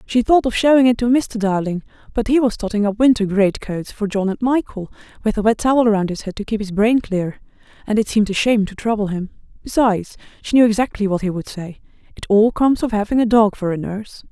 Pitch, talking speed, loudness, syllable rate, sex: 215 Hz, 245 wpm, -18 LUFS, 6.2 syllables/s, female